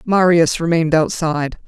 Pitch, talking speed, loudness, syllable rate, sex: 165 Hz, 110 wpm, -16 LUFS, 5.3 syllables/s, female